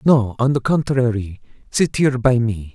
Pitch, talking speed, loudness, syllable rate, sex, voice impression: 120 Hz, 175 wpm, -18 LUFS, 4.7 syllables/s, male, masculine, adult-like, thick, tensed, soft, fluent, cool, intellectual, sincere, slightly friendly, wild, kind, slightly modest